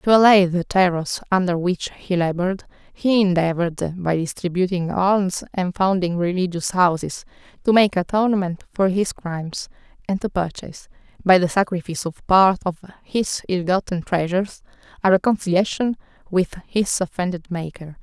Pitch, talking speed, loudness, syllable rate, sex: 185 Hz, 140 wpm, -20 LUFS, 5.0 syllables/s, female